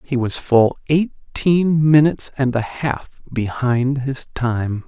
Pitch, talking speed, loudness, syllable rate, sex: 135 Hz, 135 wpm, -18 LUFS, 3.3 syllables/s, male